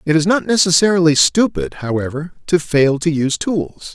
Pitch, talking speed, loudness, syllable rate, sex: 160 Hz, 165 wpm, -15 LUFS, 5.1 syllables/s, male